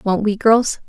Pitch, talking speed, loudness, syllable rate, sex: 210 Hz, 205 wpm, -16 LUFS, 4.1 syllables/s, female